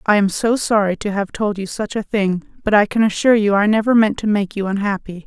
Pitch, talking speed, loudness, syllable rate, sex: 205 Hz, 260 wpm, -17 LUFS, 5.9 syllables/s, female